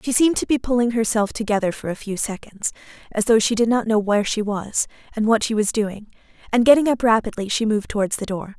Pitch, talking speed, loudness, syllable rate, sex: 220 Hz, 240 wpm, -20 LUFS, 6.3 syllables/s, female